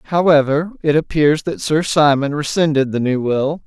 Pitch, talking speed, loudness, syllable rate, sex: 150 Hz, 165 wpm, -16 LUFS, 4.7 syllables/s, male